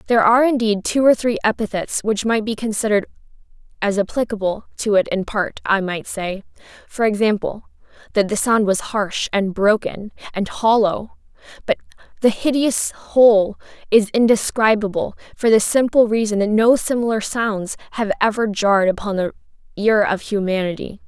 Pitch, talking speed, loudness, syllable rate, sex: 215 Hz, 150 wpm, -18 LUFS, 5.1 syllables/s, female